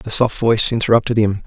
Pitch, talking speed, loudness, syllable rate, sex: 110 Hz, 205 wpm, -16 LUFS, 6.3 syllables/s, male